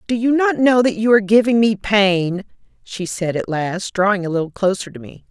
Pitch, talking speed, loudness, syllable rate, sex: 205 Hz, 225 wpm, -17 LUFS, 5.3 syllables/s, female